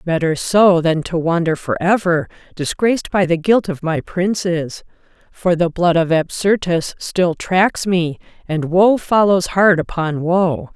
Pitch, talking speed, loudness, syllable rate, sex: 175 Hz, 150 wpm, -16 LUFS, 4.0 syllables/s, female